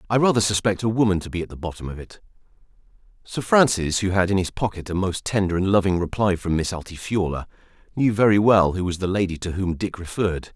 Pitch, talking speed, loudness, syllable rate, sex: 95 Hz, 220 wpm, -22 LUFS, 6.2 syllables/s, male